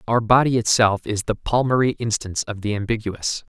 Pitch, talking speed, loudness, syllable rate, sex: 110 Hz, 170 wpm, -20 LUFS, 5.5 syllables/s, male